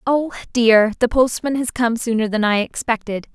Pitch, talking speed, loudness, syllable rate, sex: 235 Hz, 180 wpm, -18 LUFS, 4.8 syllables/s, female